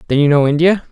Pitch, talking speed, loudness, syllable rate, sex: 155 Hz, 265 wpm, -13 LUFS, 7.0 syllables/s, male